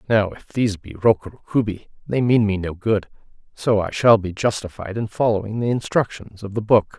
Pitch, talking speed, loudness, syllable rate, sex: 105 Hz, 190 wpm, -21 LUFS, 5.4 syllables/s, male